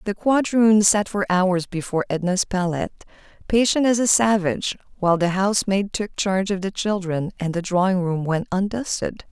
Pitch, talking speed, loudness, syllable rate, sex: 195 Hz, 175 wpm, -21 LUFS, 5.2 syllables/s, female